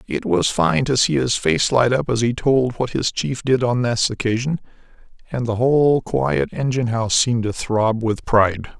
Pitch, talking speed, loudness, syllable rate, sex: 115 Hz, 205 wpm, -19 LUFS, 4.8 syllables/s, male